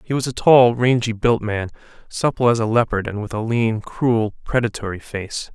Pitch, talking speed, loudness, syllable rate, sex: 115 Hz, 195 wpm, -19 LUFS, 4.8 syllables/s, male